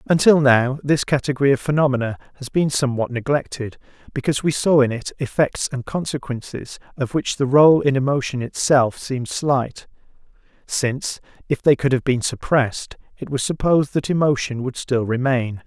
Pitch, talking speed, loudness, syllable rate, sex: 135 Hz, 160 wpm, -20 LUFS, 5.3 syllables/s, male